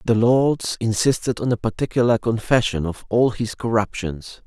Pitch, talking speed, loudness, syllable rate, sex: 115 Hz, 150 wpm, -20 LUFS, 4.8 syllables/s, male